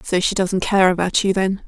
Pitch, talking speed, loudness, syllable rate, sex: 190 Hz, 250 wpm, -18 LUFS, 5.1 syllables/s, female